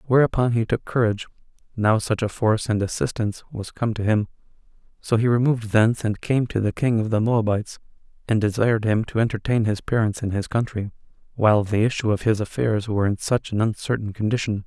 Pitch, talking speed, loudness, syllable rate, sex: 110 Hz, 195 wpm, -22 LUFS, 6.1 syllables/s, male